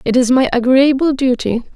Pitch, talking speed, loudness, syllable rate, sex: 255 Hz, 170 wpm, -14 LUFS, 5.1 syllables/s, female